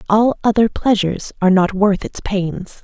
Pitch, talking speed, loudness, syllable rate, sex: 200 Hz, 170 wpm, -17 LUFS, 4.8 syllables/s, female